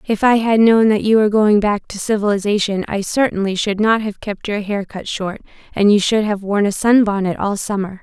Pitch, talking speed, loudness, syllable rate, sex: 205 Hz, 215 wpm, -16 LUFS, 5.2 syllables/s, female